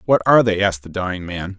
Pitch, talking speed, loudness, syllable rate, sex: 95 Hz, 265 wpm, -18 LUFS, 7.1 syllables/s, male